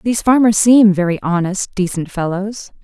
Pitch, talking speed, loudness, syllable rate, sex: 200 Hz, 150 wpm, -14 LUFS, 5.0 syllables/s, female